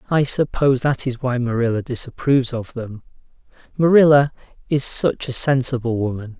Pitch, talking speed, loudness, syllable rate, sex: 130 Hz, 140 wpm, -18 LUFS, 5.3 syllables/s, male